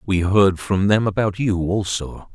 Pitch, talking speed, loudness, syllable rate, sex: 100 Hz, 180 wpm, -19 LUFS, 4.1 syllables/s, male